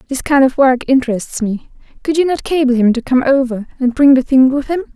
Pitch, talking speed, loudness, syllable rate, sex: 265 Hz, 240 wpm, -14 LUFS, 5.7 syllables/s, female